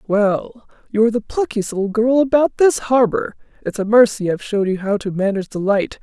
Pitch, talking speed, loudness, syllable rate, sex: 220 Hz, 210 wpm, -18 LUFS, 5.7 syllables/s, female